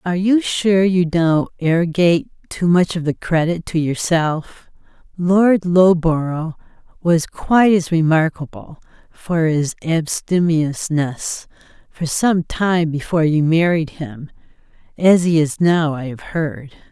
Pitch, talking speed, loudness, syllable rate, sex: 165 Hz, 130 wpm, -17 LUFS, 3.9 syllables/s, female